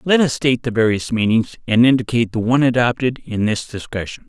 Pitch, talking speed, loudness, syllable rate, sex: 120 Hz, 195 wpm, -18 LUFS, 6.1 syllables/s, male